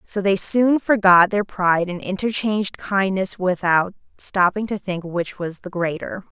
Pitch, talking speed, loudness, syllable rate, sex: 190 Hz, 160 wpm, -20 LUFS, 4.5 syllables/s, female